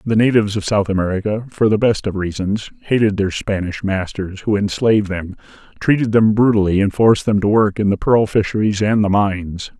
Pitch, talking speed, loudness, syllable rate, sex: 105 Hz, 195 wpm, -17 LUFS, 5.5 syllables/s, male